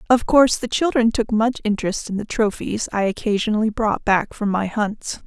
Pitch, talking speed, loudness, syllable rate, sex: 220 Hz, 195 wpm, -20 LUFS, 5.3 syllables/s, female